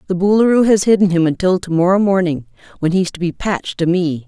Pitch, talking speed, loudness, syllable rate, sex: 180 Hz, 225 wpm, -15 LUFS, 6.1 syllables/s, female